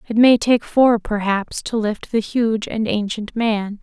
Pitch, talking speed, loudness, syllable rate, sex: 220 Hz, 190 wpm, -18 LUFS, 3.8 syllables/s, female